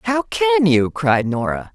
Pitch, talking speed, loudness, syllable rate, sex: 190 Hz, 170 wpm, -17 LUFS, 3.8 syllables/s, female